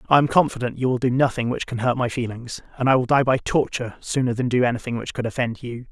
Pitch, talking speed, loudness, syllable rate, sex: 125 Hz, 275 wpm, -22 LUFS, 6.5 syllables/s, male